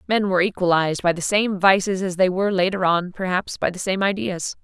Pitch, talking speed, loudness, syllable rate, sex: 185 Hz, 220 wpm, -20 LUFS, 5.9 syllables/s, female